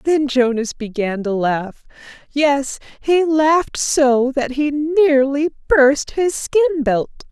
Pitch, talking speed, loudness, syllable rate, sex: 280 Hz, 130 wpm, -17 LUFS, 3.3 syllables/s, female